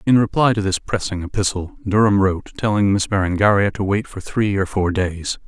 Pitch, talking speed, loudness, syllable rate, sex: 100 Hz, 195 wpm, -19 LUFS, 5.4 syllables/s, male